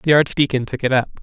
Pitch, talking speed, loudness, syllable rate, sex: 135 Hz, 245 wpm, -18 LUFS, 6.3 syllables/s, male